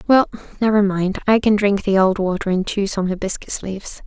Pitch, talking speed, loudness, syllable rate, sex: 200 Hz, 205 wpm, -19 LUFS, 5.4 syllables/s, female